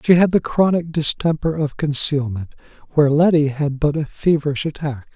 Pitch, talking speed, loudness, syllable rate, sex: 150 Hz, 165 wpm, -18 LUFS, 5.2 syllables/s, male